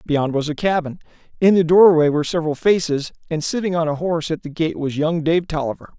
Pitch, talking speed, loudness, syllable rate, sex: 160 Hz, 220 wpm, -19 LUFS, 6.1 syllables/s, male